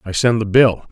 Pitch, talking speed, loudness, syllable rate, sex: 110 Hz, 260 wpm, -15 LUFS, 5.2 syllables/s, male